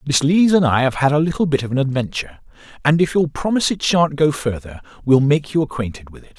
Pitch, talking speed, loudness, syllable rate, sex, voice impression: 145 Hz, 245 wpm, -18 LUFS, 6.2 syllables/s, male, masculine, middle-aged, tensed, powerful, slightly hard, clear, fluent, slightly cool, intellectual, sincere, unique, slightly wild, slightly strict, slightly sharp